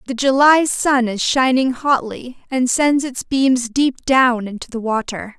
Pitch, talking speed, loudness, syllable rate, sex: 255 Hz, 165 wpm, -17 LUFS, 3.9 syllables/s, female